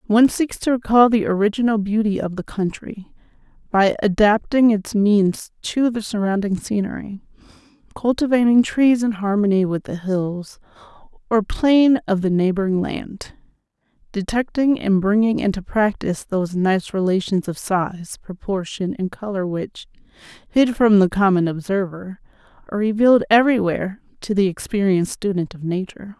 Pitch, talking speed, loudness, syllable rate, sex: 205 Hz, 135 wpm, -19 LUFS, 4.9 syllables/s, female